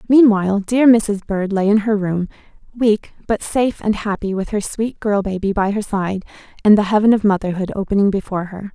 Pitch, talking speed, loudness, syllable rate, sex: 205 Hz, 200 wpm, -17 LUFS, 5.5 syllables/s, female